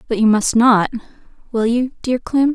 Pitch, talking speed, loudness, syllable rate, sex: 235 Hz, 165 wpm, -16 LUFS, 4.8 syllables/s, female